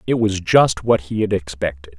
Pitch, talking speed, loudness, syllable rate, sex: 95 Hz, 210 wpm, -18 LUFS, 5.0 syllables/s, male